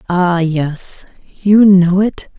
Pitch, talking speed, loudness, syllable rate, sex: 185 Hz, 125 wpm, -13 LUFS, 2.8 syllables/s, female